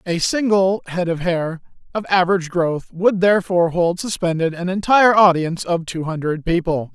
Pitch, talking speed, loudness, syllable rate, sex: 180 Hz, 165 wpm, -18 LUFS, 5.3 syllables/s, male